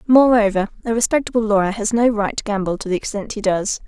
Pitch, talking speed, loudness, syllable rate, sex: 215 Hz, 215 wpm, -18 LUFS, 6.2 syllables/s, female